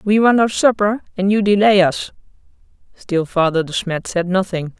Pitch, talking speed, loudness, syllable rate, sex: 195 Hz, 175 wpm, -16 LUFS, 4.8 syllables/s, female